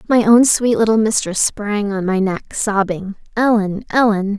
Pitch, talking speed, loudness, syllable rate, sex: 210 Hz, 165 wpm, -16 LUFS, 4.3 syllables/s, female